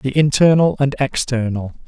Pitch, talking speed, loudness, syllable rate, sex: 135 Hz, 130 wpm, -16 LUFS, 4.6 syllables/s, male